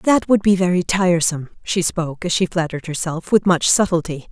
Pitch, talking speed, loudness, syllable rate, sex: 175 Hz, 195 wpm, -18 LUFS, 5.8 syllables/s, female